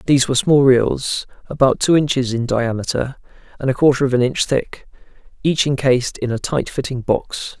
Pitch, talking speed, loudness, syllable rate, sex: 130 Hz, 180 wpm, -18 LUFS, 5.3 syllables/s, male